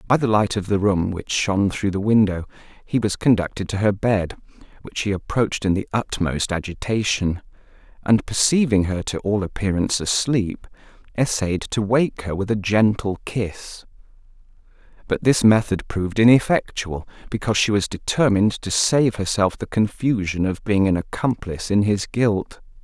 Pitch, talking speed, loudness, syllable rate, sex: 105 Hz, 160 wpm, -21 LUFS, 4.9 syllables/s, male